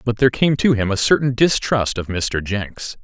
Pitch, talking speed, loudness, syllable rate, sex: 115 Hz, 215 wpm, -18 LUFS, 4.8 syllables/s, male